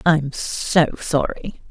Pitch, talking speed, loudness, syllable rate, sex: 155 Hz, 105 wpm, -20 LUFS, 2.8 syllables/s, female